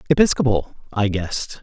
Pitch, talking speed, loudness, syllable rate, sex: 115 Hz, 110 wpm, -20 LUFS, 5.6 syllables/s, male